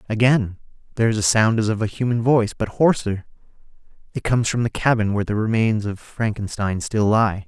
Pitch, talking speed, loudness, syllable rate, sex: 110 Hz, 195 wpm, -20 LUFS, 5.8 syllables/s, male